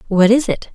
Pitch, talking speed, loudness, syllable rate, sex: 210 Hz, 245 wpm, -15 LUFS, 5.3 syllables/s, female